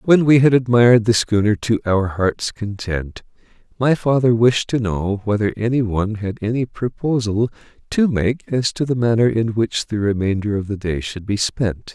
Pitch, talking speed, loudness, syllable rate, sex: 110 Hz, 185 wpm, -18 LUFS, 4.7 syllables/s, male